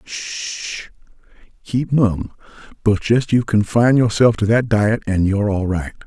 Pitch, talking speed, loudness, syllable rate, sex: 110 Hz, 140 wpm, -18 LUFS, 4.2 syllables/s, male